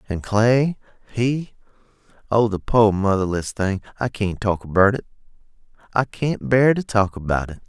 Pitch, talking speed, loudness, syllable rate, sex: 110 Hz, 135 wpm, -20 LUFS, 4.5 syllables/s, male